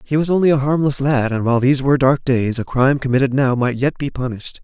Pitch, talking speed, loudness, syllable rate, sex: 135 Hz, 260 wpm, -17 LUFS, 6.7 syllables/s, male